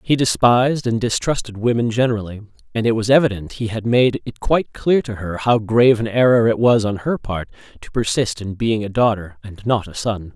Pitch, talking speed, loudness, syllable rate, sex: 110 Hz, 215 wpm, -18 LUFS, 5.5 syllables/s, male